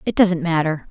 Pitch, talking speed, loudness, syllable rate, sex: 170 Hz, 200 wpm, -18 LUFS, 5.1 syllables/s, female